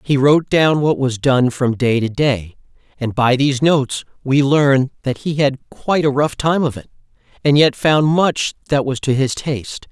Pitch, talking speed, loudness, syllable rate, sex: 135 Hz, 205 wpm, -16 LUFS, 4.7 syllables/s, male